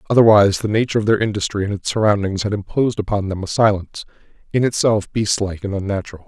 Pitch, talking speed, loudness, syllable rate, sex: 100 Hz, 200 wpm, -18 LUFS, 7.0 syllables/s, male